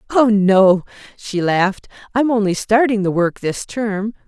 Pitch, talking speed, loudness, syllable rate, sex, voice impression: 210 Hz, 125 wpm, -17 LUFS, 4.4 syllables/s, female, feminine, middle-aged, tensed, powerful, clear, raspy, intellectual, elegant, lively, slightly strict